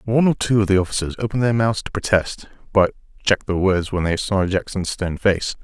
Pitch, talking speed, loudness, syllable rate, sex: 100 Hz, 225 wpm, -20 LUFS, 5.9 syllables/s, male